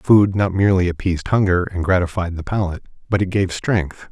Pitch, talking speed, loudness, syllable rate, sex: 95 Hz, 190 wpm, -19 LUFS, 5.8 syllables/s, male